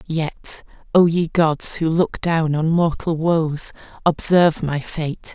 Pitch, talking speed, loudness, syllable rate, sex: 160 Hz, 145 wpm, -19 LUFS, 3.5 syllables/s, female